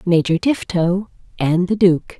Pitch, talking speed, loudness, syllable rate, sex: 180 Hz, 135 wpm, -18 LUFS, 3.9 syllables/s, female